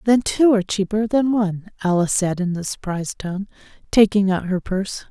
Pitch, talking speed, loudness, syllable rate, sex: 200 Hz, 190 wpm, -20 LUFS, 5.7 syllables/s, female